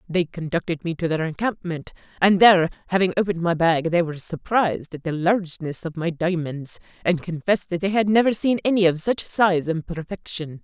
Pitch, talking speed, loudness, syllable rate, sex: 175 Hz, 190 wpm, -22 LUFS, 5.6 syllables/s, female